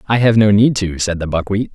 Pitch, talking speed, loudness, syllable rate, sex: 105 Hz, 275 wpm, -15 LUFS, 5.7 syllables/s, male